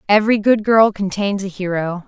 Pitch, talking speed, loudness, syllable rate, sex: 200 Hz, 175 wpm, -17 LUFS, 5.2 syllables/s, female